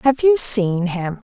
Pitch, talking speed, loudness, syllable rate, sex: 220 Hz, 180 wpm, -18 LUFS, 3.5 syllables/s, female